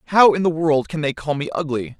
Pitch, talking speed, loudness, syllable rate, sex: 155 Hz, 270 wpm, -19 LUFS, 5.9 syllables/s, male